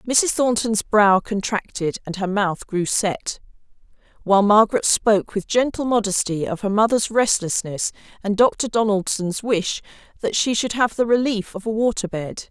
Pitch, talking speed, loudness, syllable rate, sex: 210 Hz, 160 wpm, -20 LUFS, 4.7 syllables/s, female